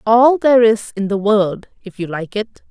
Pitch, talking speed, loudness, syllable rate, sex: 215 Hz, 220 wpm, -15 LUFS, 4.9 syllables/s, female